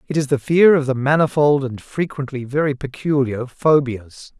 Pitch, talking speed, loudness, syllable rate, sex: 140 Hz, 165 wpm, -18 LUFS, 4.7 syllables/s, male